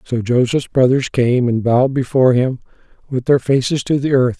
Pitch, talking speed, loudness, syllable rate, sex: 130 Hz, 190 wpm, -16 LUFS, 5.3 syllables/s, male